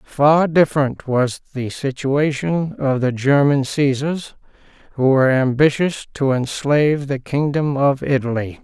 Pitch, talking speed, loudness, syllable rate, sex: 140 Hz, 125 wpm, -18 LUFS, 4.2 syllables/s, male